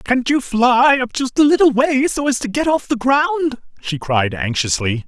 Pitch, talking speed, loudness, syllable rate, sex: 235 Hz, 215 wpm, -16 LUFS, 4.4 syllables/s, male